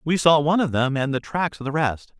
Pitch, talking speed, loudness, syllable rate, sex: 145 Hz, 300 wpm, -21 LUFS, 6.0 syllables/s, male